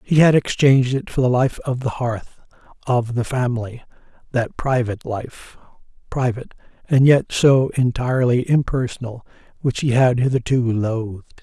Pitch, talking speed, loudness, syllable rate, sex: 125 Hz, 135 wpm, -19 LUFS, 4.9 syllables/s, male